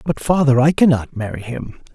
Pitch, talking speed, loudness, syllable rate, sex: 140 Hz, 185 wpm, -16 LUFS, 5.2 syllables/s, male